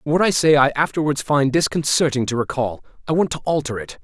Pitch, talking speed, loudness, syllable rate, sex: 145 Hz, 210 wpm, -19 LUFS, 5.9 syllables/s, male